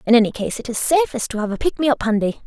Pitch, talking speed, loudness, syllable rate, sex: 245 Hz, 315 wpm, -19 LUFS, 6.9 syllables/s, female